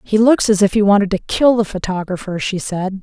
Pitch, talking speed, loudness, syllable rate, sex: 200 Hz, 240 wpm, -16 LUFS, 5.6 syllables/s, female